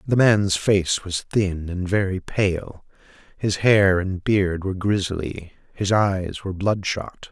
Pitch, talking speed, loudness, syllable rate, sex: 95 Hz, 150 wpm, -22 LUFS, 3.6 syllables/s, male